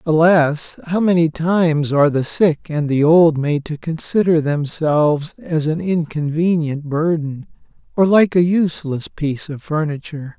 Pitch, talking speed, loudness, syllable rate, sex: 160 Hz, 145 wpm, -17 LUFS, 4.5 syllables/s, male